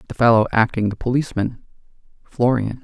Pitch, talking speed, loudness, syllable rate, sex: 115 Hz, 105 wpm, -19 LUFS, 6.0 syllables/s, male